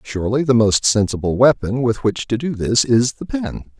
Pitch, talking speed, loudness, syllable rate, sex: 120 Hz, 205 wpm, -17 LUFS, 5.0 syllables/s, male